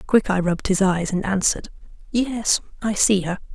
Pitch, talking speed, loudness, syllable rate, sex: 195 Hz, 170 wpm, -21 LUFS, 5.3 syllables/s, female